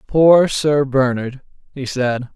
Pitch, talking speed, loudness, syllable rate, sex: 135 Hz, 125 wpm, -16 LUFS, 3.2 syllables/s, male